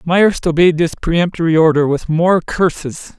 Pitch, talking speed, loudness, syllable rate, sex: 165 Hz, 150 wpm, -14 LUFS, 4.8 syllables/s, male